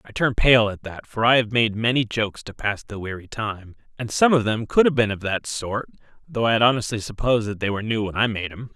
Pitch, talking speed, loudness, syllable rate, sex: 110 Hz, 265 wpm, -22 LUFS, 6.0 syllables/s, male